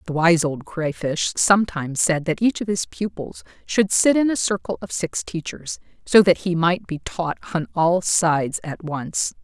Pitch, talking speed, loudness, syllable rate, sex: 155 Hz, 190 wpm, -21 LUFS, 4.5 syllables/s, female